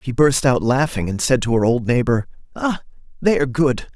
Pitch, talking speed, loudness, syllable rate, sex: 130 Hz, 210 wpm, -19 LUFS, 5.4 syllables/s, male